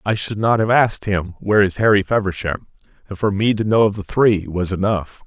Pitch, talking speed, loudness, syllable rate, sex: 100 Hz, 230 wpm, -18 LUFS, 5.5 syllables/s, male